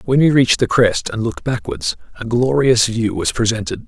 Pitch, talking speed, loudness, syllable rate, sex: 120 Hz, 200 wpm, -16 LUFS, 5.4 syllables/s, male